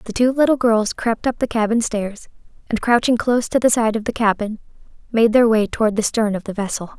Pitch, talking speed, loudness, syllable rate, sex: 225 Hz, 230 wpm, -18 LUFS, 5.7 syllables/s, female